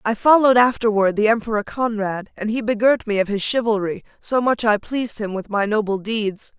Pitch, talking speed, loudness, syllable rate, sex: 220 Hz, 200 wpm, -19 LUFS, 5.5 syllables/s, female